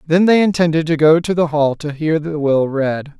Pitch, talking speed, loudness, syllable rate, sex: 155 Hz, 245 wpm, -15 LUFS, 4.9 syllables/s, male